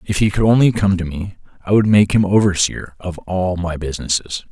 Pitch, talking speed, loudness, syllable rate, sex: 95 Hz, 210 wpm, -17 LUFS, 5.2 syllables/s, male